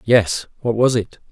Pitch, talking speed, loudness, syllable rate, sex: 115 Hz, 185 wpm, -19 LUFS, 4.0 syllables/s, male